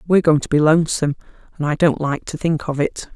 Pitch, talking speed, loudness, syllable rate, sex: 155 Hz, 230 wpm, -18 LUFS, 6.7 syllables/s, female